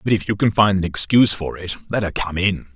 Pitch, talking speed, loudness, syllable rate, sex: 95 Hz, 285 wpm, -19 LUFS, 5.9 syllables/s, male